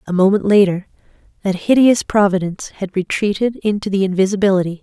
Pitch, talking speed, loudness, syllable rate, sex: 195 Hz, 135 wpm, -16 LUFS, 6.1 syllables/s, female